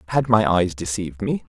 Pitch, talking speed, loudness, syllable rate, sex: 100 Hz, 195 wpm, -21 LUFS, 5.5 syllables/s, male